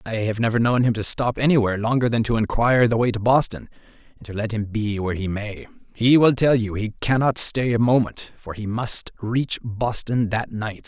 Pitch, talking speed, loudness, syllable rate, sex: 115 Hz, 215 wpm, -21 LUFS, 5.3 syllables/s, male